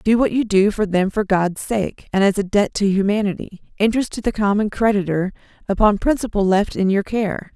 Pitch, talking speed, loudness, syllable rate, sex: 205 Hz, 200 wpm, -19 LUFS, 5.4 syllables/s, female